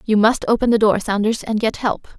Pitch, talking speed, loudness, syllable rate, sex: 220 Hz, 245 wpm, -18 LUFS, 5.4 syllables/s, female